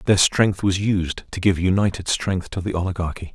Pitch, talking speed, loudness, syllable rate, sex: 95 Hz, 195 wpm, -21 LUFS, 5.1 syllables/s, male